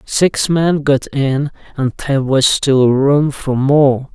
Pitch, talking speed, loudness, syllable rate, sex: 140 Hz, 160 wpm, -14 LUFS, 3.3 syllables/s, male